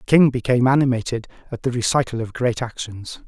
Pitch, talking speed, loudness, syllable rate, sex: 120 Hz, 185 wpm, -20 LUFS, 6.3 syllables/s, male